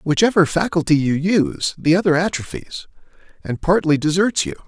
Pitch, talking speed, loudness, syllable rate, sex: 165 Hz, 140 wpm, -18 LUFS, 5.4 syllables/s, male